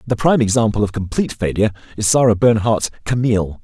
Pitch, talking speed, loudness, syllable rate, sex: 110 Hz, 165 wpm, -17 LUFS, 6.8 syllables/s, male